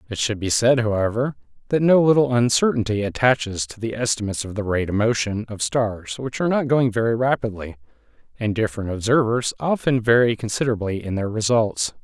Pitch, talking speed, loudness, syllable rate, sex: 115 Hz, 175 wpm, -21 LUFS, 5.8 syllables/s, male